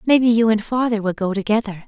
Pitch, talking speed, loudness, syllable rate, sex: 220 Hz, 255 wpm, -18 LUFS, 6.4 syllables/s, female